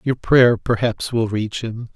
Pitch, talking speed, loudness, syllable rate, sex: 115 Hz, 185 wpm, -18 LUFS, 3.9 syllables/s, male